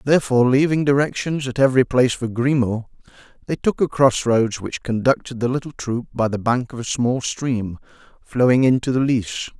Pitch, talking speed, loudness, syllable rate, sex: 125 Hz, 175 wpm, -20 LUFS, 5.3 syllables/s, male